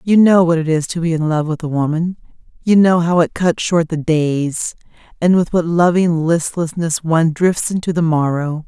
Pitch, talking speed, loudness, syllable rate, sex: 165 Hz, 210 wpm, -16 LUFS, 4.8 syllables/s, female